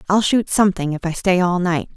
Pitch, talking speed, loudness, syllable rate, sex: 180 Hz, 245 wpm, -18 LUFS, 5.9 syllables/s, female